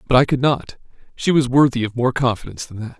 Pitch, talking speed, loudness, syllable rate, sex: 125 Hz, 240 wpm, -18 LUFS, 6.5 syllables/s, male